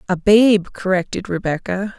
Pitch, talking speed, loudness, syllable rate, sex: 190 Hz, 120 wpm, -17 LUFS, 4.6 syllables/s, female